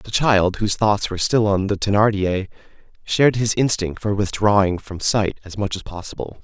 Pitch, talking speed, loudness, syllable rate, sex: 100 Hz, 185 wpm, -19 LUFS, 5.2 syllables/s, male